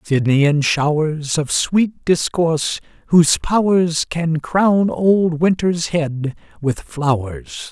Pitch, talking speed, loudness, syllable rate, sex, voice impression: 160 Hz, 110 wpm, -17 LUFS, 3.1 syllables/s, male, very masculine, very old, thick, very relaxed, very weak, slightly bright, soft, slightly muffled, slightly halting, slightly raspy, intellectual, very sincere, calm, very mature, very friendly, very reassuring, elegant, slightly sweet, slightly lively, very kind, very modest, very light